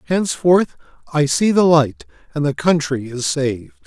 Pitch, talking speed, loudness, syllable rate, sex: 155 Hz, 155 wpm, -17 LUFS, 4.7 syllables/s, male